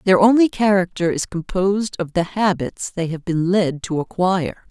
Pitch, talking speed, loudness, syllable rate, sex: 180 Hz, 180 wpm, -19 LUFS, 4.9 syllables/s, female